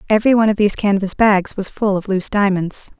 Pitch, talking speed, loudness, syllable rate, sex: 200 Hz, 220 wpm, -16 LUFS, 6.5 syllables/s, female